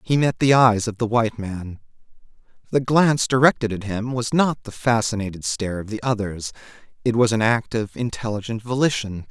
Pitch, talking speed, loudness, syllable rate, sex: 115 Hz, 180 wpm, -21 LUFS, 5.4 syllables/s, male